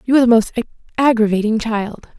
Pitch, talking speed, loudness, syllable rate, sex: 230 Hz, 165 wpm, -16 LUFS, 6.2 syllables/s, female